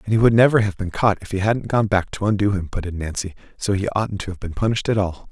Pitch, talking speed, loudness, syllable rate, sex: 100 Hz, 305 wpm, -21 LUFS, 6.4 syllables/s, male